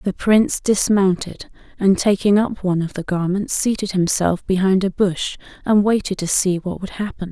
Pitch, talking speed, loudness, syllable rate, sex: 190 Hz, 180 wpm, -19 LUFS, 5.0 syllables/s, female